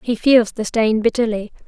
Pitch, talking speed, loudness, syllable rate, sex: 225 Hz, 180 wpm, -17 LUFS, 4.8 syllables/s, female